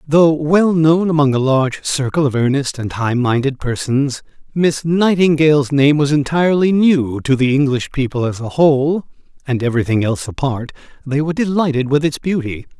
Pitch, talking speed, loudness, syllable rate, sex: 145 Hz, 160 wpm, -16 LUFS, 5.2 syllables/s, male